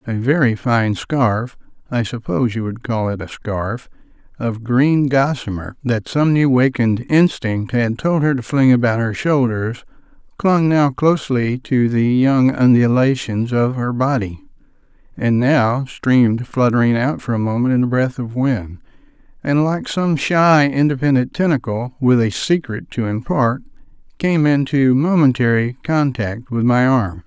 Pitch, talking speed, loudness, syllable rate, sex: 125 Hz, 145 wpm, -17 LUFS, 4.3 syllables/s, male